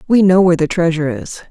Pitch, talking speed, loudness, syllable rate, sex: 175 Hz, 240 wpm, -14 LUFS, 7.1 syllables/s, female